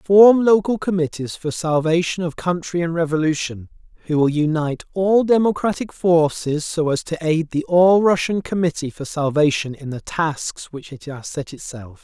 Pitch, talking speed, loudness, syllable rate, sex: 165 Hz, 165 wpm, -19 LUFS, 4.7 syllables/s, male